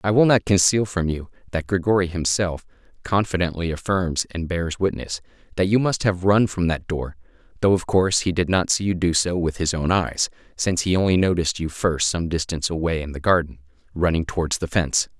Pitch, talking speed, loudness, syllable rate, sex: 90 Hz, 205 wpm, -22 LUFS, 5.6 syllables/s, male